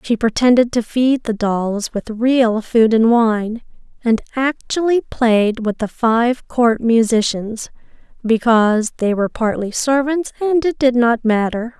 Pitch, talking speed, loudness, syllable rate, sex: 235 Hz, 150 wpm, -16 LUFS, 3.9 syllables/s, female